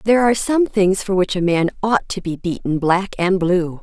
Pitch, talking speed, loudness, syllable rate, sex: 190 Hz, 235 wpm, -18 LUFS, 5.0 syllables/s, female